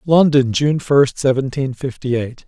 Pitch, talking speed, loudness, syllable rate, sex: 135 Hz, 145 wpm, -17 LUFS, 4.8 syllables/s, male